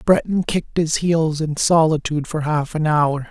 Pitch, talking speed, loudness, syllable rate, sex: 155 Hz, 180 wpm, -19 LUFS, 4.7 syllables/s, male